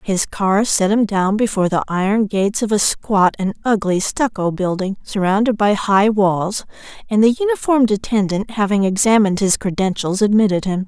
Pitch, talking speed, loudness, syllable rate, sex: 205 Hz, 165 wpm, -17 LUFS, 5.2 syllables/s, female